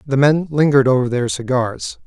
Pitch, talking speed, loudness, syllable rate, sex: 135 Hz, 175 wpm, -16 LUFS, 5.2 syllables/s, male